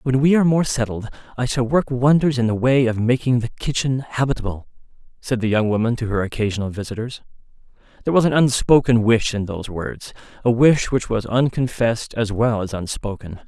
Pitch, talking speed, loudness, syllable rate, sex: 120 Hz, 185 wpm, -20 LUFS, 5.8 syllables/s, male